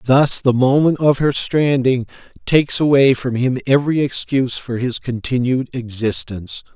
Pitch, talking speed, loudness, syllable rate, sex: 130 Hz, 140 wpm, -17 LUFS, 4.8 syllables/s, male